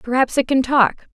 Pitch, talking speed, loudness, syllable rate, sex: 255 Hz, 210 wpm, -17 LUFS, 5.8 syllables/s, female